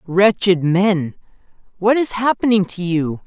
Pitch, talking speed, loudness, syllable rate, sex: 190 Hz, 130 wpm, -17 LUFS, 4.0 syllables/s, male